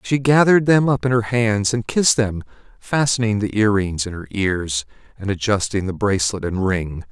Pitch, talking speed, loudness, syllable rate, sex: 105 Hz, 195 wpm, -19 LUFS, 5.1 syllables/s, male